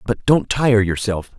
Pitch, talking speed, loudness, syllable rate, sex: 110 Hz, 175 wpm, -18 LUFS, 4.4 syllables/s, male